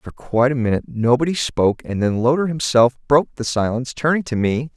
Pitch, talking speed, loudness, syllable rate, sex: 130 Hz, 200 wpm, -19 LUFS, 6.2 syllables/s, male